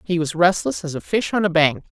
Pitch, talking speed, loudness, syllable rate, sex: 170 Hz, 270 wpm, -20 LUFS, 5.6 syllables/s, female